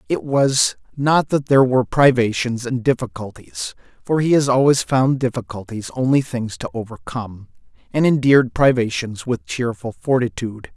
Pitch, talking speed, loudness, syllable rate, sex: 125 Hz, 140 wpm, -19 LUFS, 5.0 syllables/s, male